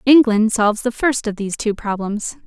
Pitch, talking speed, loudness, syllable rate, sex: 225 Hz, 195 wpm, -18 LUFS, 5.3 syllables/s, female